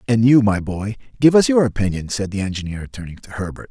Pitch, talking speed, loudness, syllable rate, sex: 110 Hz, 225 wpm, -18 LUFS, 6.0 syllables/s, male